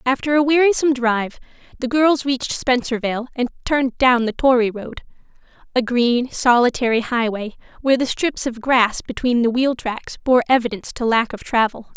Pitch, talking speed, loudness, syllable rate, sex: 245 Hz, 165 wpm, -19 LUFS, 5.4 syllables/s, female